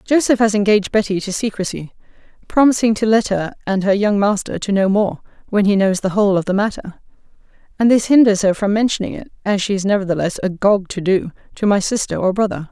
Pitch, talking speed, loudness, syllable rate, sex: 205 Hz, 210 wpm, -17 LUFS, 6.1 syllables/s, female